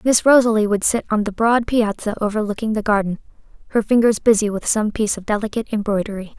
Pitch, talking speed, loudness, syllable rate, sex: 215 Hz, 190 wpm, -18 LUFS, 6.4 syllables/s, female